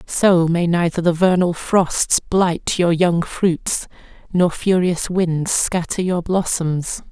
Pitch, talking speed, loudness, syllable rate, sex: 175 Hz, 135 wpm, -18 LUFS, 3.2 syllables/s, female